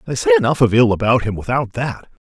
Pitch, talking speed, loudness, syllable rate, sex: 115 Hz, 235 wpm, -16 LUFS, 6.3 syllables/s, male